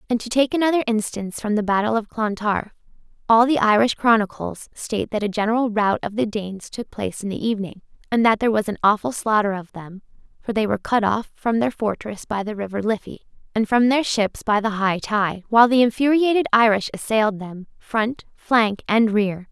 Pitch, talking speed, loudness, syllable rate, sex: 220 Hz, 200 wpm, -20 LUFS, 5.6 syllables/s, female